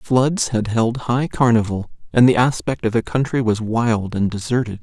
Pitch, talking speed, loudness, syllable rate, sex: 115 Hz, 185 wpm, -19 LUFS, 4.6 syllables/s, male